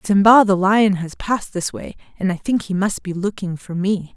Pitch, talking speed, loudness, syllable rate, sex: 195 Hz, 230 wpm, -18 LUFS, 5.0 syllables/s, female